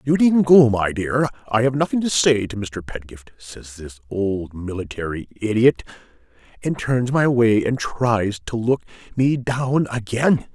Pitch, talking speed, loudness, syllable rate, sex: 115 Hz, 165 wpm, -20 LUFS, 4.1 syllables/s, male